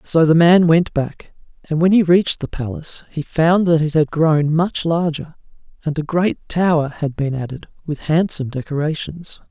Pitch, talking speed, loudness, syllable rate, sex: 160 Hz, 185 wpm, -17 LUFS, 4.8 syllables/s, male